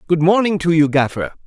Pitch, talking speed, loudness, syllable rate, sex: 165 Hz, 205 wpm, -16 LUFS, 6.0 syllables/s, male